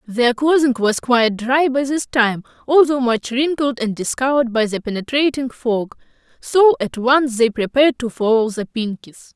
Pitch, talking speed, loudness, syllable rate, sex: 250 Hz, 165 wpm, -17 LUFS, 4.8 syllables/s, female